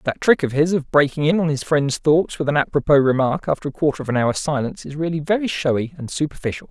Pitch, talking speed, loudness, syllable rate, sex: 145 Hz, 250 wpm, -20 LUFS, 6.4 syllables/s, male